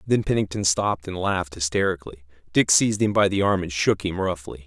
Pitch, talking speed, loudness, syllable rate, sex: 90 Hz, 205 wpm, -22 LUFS, 6.1 syllables/s, male